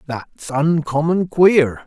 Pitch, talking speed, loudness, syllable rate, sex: 150 Hz, 95 wpm, -16 LUFS, 2.9 syllables/s, male